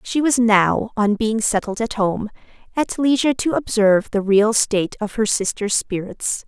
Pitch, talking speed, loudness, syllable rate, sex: 215 Hz, 175 wpm, -19 LUFS, 4.6 syllables/s, female